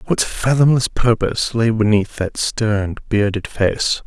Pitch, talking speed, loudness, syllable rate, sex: 110 Hz, 135 wpm, -18 LUFS, 4.0 syllables/s, male